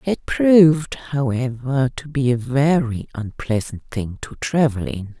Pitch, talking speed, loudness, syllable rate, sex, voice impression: 135 Hz, 140 wpm, -20 LUFS, 4.0 syllables/s, female, very feminine, slightly young, adult-like, very thin, tensed, slightly weak, slightly dark, hard